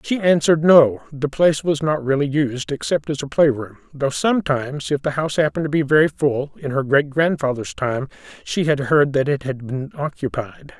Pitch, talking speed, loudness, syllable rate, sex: 145 Hz, 200 wpm, -19 LUFS, 5.3 syllables/s, male